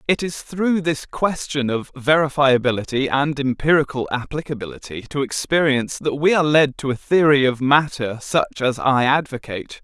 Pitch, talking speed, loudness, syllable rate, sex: 140 Hz, 155 wpm, -19 LUFS, 5.0 syllables/s, male